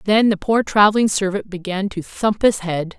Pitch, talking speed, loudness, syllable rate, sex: 200 Hz, 200 wpm, -18 LUFS, 4.9 syllables/s, female